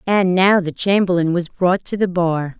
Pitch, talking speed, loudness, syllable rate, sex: 180 Hz, 210 wpm, -17 LUFS, 4.5 syllables/s, female